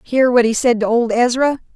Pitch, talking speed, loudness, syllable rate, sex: 240 Hz, 240 wpm, -15 LUFS, 5.3 syllables/s, female